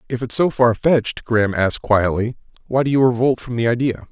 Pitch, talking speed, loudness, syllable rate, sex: 120 Hz, 220 wpm, -18 LUFS, 5.8 syllables/s, male